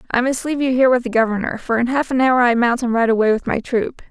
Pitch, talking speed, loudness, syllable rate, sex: 245 Hz, 305 wpm, -17 LUFS, 6.8 syllables/s, female